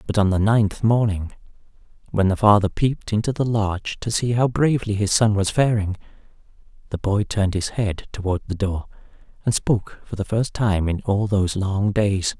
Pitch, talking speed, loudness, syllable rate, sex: 105 Hz, 190 wpm, -21 LUFS, 5.3 syllables/s, male